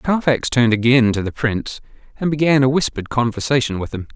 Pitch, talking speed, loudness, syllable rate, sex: 125 Hz, 190 wpm, -18 LUFS, 6.3 syllables/s, male